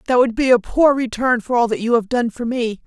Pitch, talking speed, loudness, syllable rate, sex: 240 Hz, 295 wpm, -17 LUFS, 5.6 syllables/s, female